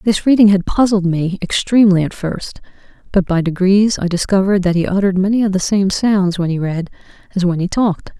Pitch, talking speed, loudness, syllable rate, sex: 190 Hz, 205 wpm, -15 LUFS, 5.8 syllables/s, female